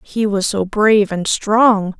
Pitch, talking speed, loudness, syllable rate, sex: 205 Hz, 180 wpm, -15 LUFS, 3.7 syllables/s, female